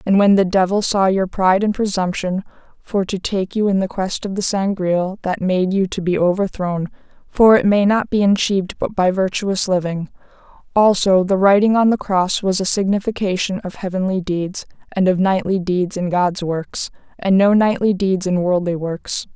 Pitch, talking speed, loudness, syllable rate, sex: 190 Hz, 190 wpm, -18 LUFS, 4.8 syllables/s, female